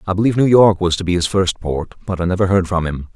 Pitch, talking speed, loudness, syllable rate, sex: 90 Hz, 305 wpm, -16 LUFS, 6.6 syllables/s, male